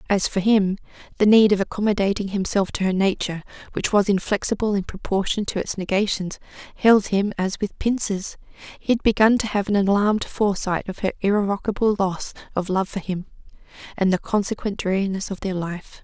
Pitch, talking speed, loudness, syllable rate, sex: 200 Hz, 175 wpm, -22 LUFS, 5.7 syllables/s, female